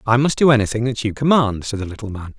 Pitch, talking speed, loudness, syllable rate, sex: 115 Hz, 275 wpm, -18 LUFS, 6.7 syllables/s, male